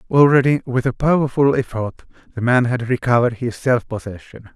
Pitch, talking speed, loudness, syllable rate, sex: 125 Hz, 160 wpm, -18 LUFS, 5.5 syllables/s, male